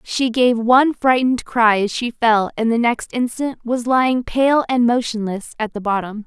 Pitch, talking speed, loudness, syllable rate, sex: 235 Hz, 190 wpm, -18 LUFS, 4.7 syllables/s, female